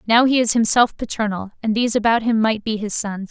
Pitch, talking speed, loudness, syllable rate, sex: 220 Hz, 235 wpm, -19 LUFS, 5.9 syllables/s, female